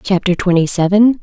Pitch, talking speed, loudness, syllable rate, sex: 190 Hz, 145 wpm, -13 LUFS, 5.3 syllables/s, female